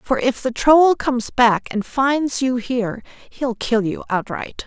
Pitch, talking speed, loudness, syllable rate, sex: 255 Hz, 180 wpm, -19 LUFS, 3.9 syllables/s, female